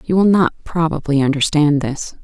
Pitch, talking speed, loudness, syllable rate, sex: 155 Hz, 160 wpm, -16 LUFS, 5.0 syllables/s, female